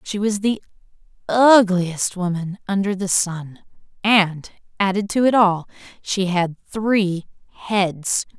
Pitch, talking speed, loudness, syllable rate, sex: 195 Hz, 120 wpm, -19 LUFS, 3.5 syllables/s, female